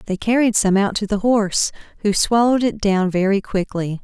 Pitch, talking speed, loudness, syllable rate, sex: 205 Hz, 195 wpm, -18 LUFS, 5.4 syllables/s, female